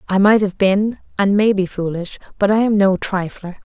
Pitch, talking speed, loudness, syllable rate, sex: 200 Hz, 210 wpm, -17 LUFS, 4.9 syllables/s, female